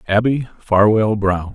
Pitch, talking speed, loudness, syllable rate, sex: 105 Hz, 115 wpm, -16 LUFS, 3.9 syllables/s, male